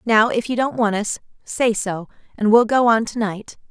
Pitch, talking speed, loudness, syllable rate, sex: 220 Hz, 225 wpm, -19 LUFS, 4.8 syllables/s, female